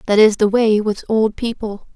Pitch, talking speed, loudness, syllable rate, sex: 215 Hz, 215 wpm, -16 LUFS, 4.7 syllables/s, female